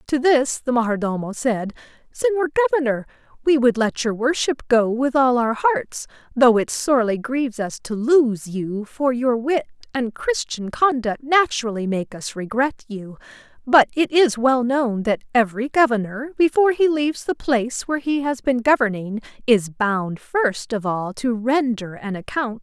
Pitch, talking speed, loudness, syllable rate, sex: 250 Hz, 165 wpm, -20 LUFS, 4.7 syllables/s, female